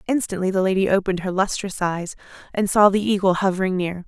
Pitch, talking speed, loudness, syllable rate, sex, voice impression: 190 Hz, 190 wpm, -21 LUFS, 6.3 syllables/s, female, very feminine, slightly young, slightly adult-like, thin, tensed, slightly powerful, bright, hard, very clear, fluent, cute, slightly cool, intellectual, very refreshing, sincere, slightly calm, friendly, reassuring, very elegant, slightly sweet, lively, slightly strict, slightly intense, slightly sharp